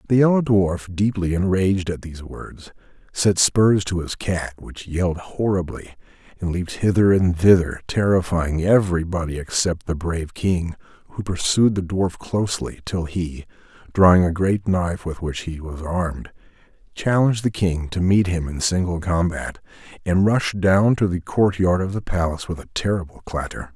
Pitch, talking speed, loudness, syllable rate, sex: 90 Hz, 160 wpm, -21 LUFS, 4.9 syllables/s, male